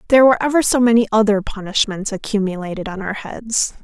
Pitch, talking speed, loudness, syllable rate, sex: 215 Hz, 170 wpm, -17 LUFS, 6.3 syllables/s, female